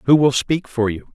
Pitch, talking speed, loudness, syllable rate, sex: 130 Hz, 260 wpm, -18 LUFS, 5.1 syllables/s, male